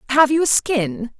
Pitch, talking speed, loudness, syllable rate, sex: 260 Hz, 200 wpm, -17 LUFS, 4.3 syllables/s, female